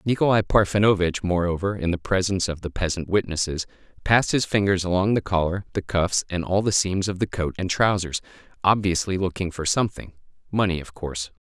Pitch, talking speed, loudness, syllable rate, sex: 95 Hz, 175 wpm, -23 LUFS, 5.8 syllables/s, male